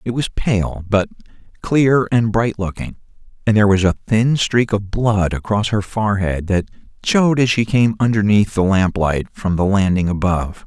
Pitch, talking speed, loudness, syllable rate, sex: 105 Hz, 180 wpm, -17 LUFS, 4.8 syllables/s, male